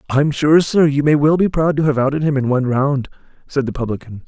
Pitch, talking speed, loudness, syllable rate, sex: 140 Hz, 250 wpm, -16 LUFS, 6.0 syllables/s, male